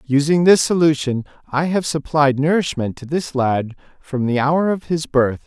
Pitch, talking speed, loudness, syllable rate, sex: 145 Hz, 175 wpm, -18 LUFS, 4.6 syllables/s, male